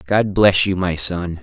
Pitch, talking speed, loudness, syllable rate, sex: 90 Hz, 210 wpm, -17 LUFS, 3.9 syllables/s, male